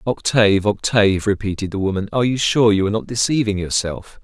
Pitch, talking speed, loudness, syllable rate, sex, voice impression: 105 Hz, 185 wpm, -18 LUFS, 6.1 syllables/s, male, masculine, adult-like, relaxed, soft, slightly halting, intellectual, calm, friendly, reassuring, wild, kind, modest